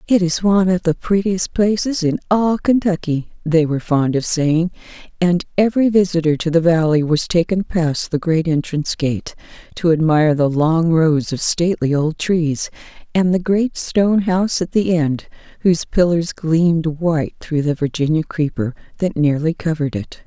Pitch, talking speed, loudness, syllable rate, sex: 165 Hz, 170 wpm, -17 LUFS, 4.9 syllables/s, female